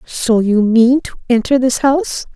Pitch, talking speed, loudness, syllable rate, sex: 240 Hz, 180 wpm, -14 LUFS, 4.3 syllables/s, female